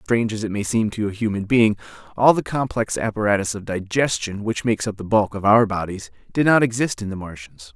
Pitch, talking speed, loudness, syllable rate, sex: 105 Hz, 225 wpm, -21 LUFS, 5.8 syllables/s, male